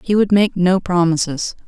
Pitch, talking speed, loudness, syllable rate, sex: 180 Hz, 180 wpm, -16 LUFS, 4.7 syllables/s, female